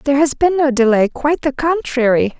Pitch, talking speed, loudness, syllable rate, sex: 275 Hz, 200 wpm, -15 LUFS, 5.7 syllables/s, female